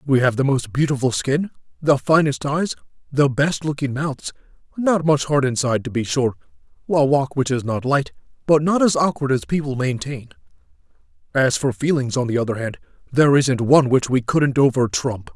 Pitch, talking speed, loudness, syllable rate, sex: 135 Hz, 175 wpm, -19 LUFS, 5.2 syllables/s, male